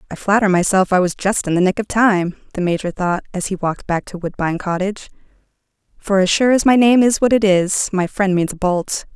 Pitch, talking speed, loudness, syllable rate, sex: 195 Hz, 230 wpm, -17 LUFS, 5.7 syllables/s, female